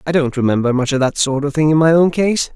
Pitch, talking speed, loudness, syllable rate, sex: 145 Hz, 305 wpm, -15 LUFS, 6.2 syllables/s, male